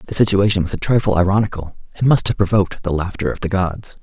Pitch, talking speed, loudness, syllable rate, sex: 95 Hz, 225 wpm, -18 LUFS, 6.6 syllables/s, male